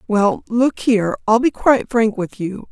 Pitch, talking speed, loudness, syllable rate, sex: 225 Hz, 200 wpm, -17 LUFS, 4.7 syllables/s, female